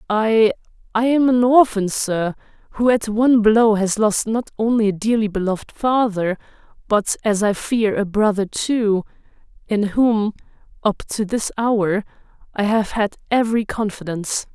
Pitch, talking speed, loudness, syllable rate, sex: 215 Hz, 145 wpm, -19 LUFS, 4.5 syllables/s, female